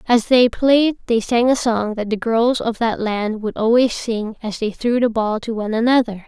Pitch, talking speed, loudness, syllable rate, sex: 230 Hz, 230 wpm, -18 LUFS, 4.7 syllables/s, female